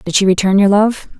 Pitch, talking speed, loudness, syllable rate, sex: 195 Hz, 250 wpm, -13 LUFS, 5.8 syllables/s, female